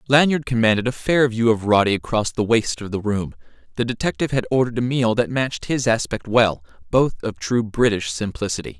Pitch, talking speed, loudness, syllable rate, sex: 115 Hz, 190 wpm, -20 LUFS, 5.8 syllables/s, male